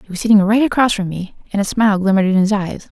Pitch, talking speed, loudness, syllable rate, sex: 205 Hz, 280 wpm, -15 LUFS, 7.2 syllables/s, female